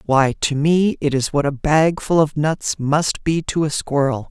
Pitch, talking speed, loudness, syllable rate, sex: 150 Hz, 225 wpm, -18 LUFS, 4.2 syllables/s, female